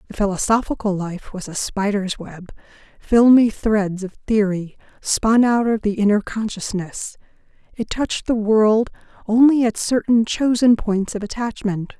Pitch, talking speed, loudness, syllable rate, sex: 215 Hz, 130 wpm, -19 LUFS, 4.5 syllables/s, female